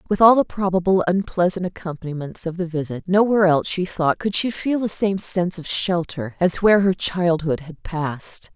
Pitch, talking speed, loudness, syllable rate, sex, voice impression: 180 Hz, 190 wpm, -20 LUFS, 5.3 syllables/s, female, feminine, very adult-like, slightly intellectual